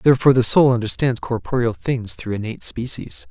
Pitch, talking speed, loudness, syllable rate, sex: 120 Hz, 165 wpm, -19 LUFS, 5.9 syllables/s, male